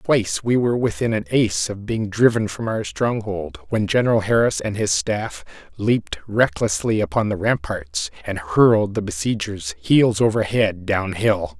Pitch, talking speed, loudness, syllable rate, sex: 110 Hz, 165 wpm, -20 LUFS, 4.6 syllables/s, male